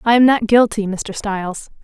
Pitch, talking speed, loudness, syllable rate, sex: 215 Hz, 195 wpm, -16 LUFS, 4.9 syllables/s, female